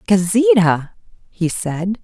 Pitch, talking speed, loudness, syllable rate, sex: 200 Hz, 90 wpm, -16 LUFS, 3.3 syllables/s, female